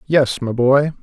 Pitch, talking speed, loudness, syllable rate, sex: 135 Hz, 175 wpm, -16 LUFS, 3.6 syllables/s, male